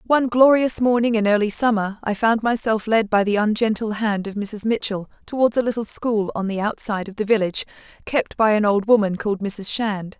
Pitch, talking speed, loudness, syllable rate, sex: 215 Hz, 205 wpm, -20 LUFS, 5.5 syllables/s, female